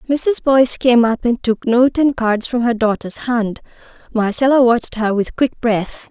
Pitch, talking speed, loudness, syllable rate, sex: 240 Hz, 185 wpm, -16 LUFS, 4.5 syllables/s, female